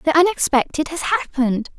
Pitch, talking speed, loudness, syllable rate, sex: 285 Hz, 135 wpm, -19 LUFS, 5.7 syllables/s, female